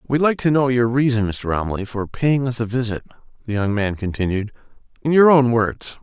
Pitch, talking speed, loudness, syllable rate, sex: 120 Hz, 210 wpm, -19 LUFS, 5.4 syllables/s, male